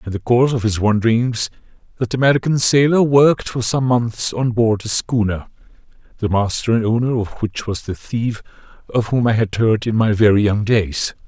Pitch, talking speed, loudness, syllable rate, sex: 115 Hz, 190 wpm, -17 LUFS, 5.1 syllables/s, male